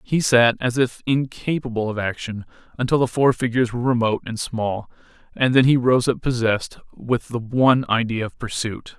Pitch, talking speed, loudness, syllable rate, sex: 120 Hz, 180 wpm, -21 LUFS, 5.4 syllables/s, male